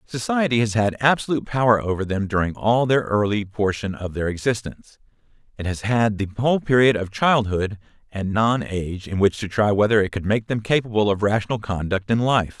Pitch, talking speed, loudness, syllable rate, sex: 110 Hz, 190 wpm, -21 LUFS, 5.6 syllables/s, male